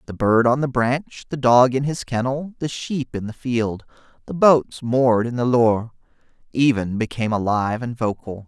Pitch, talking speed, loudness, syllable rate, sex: 120 Hz, 185 wpm, -20 LUFS, 4.9 syllables/s, male